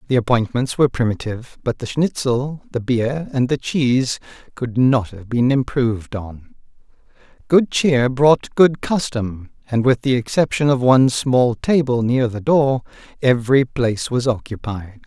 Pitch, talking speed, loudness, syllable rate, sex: 125 Hz, 150 wpm, -18 LUFS, 4.5 syllables/s, male